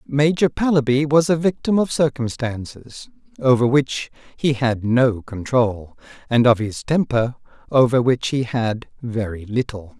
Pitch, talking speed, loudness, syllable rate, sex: 130 Hz, 140 wpm, -19 LUFS, 4.2 syllables/s, male